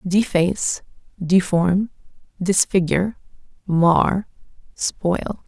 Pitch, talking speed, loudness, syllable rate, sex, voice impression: 185 Hz, 55 wpm, -20 LUFS, 3.3 syllables/s, female, very feminine, very adult-like, slightly middle-aged, slightly tensed, slightly weak, slightly dark, hard, muffled, slightly fluent, slightly raspy, very cool, very intellectual, sincere, very calm, slightly mature, very friendly, very reassuring, very unique, elegant, very wild, sweet, kind, modest